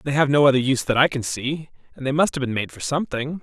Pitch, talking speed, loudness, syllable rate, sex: 135 Hz, 300 wpm, -21 LUFS, 6.8 syllables/s, male